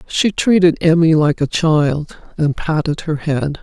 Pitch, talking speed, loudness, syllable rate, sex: 160 Hz, 165 wpm, -16 LUFS, 4.0 syllables/s, female